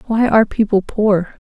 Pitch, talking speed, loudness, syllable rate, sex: 205 Hz, 165 wpm, -15 LUFS, 4.8 syllables/s, female